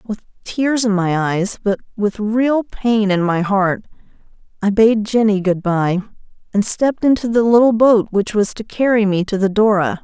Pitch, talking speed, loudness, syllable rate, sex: 210 Hz, 185 wpm, -16 LUFS, 4.5 syllables/s, female